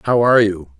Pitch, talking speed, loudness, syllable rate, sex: 110 Hz, 225 wpm, -15 LUFS, 6.4 syllables/s, male